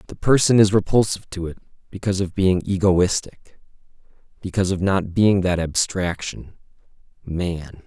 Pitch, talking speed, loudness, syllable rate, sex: 95 Hz, 130 wpm, -20 LUFS, 5.0 syllables/s, male